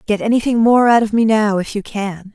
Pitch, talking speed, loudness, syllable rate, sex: 215 Hz, 255 wpm, -15 LUFS, 5.4 syllables/s, female